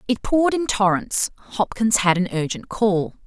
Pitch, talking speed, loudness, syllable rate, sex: 210 Hz, 165 wpm, -21 LUFS, 4.8 syllables/s, female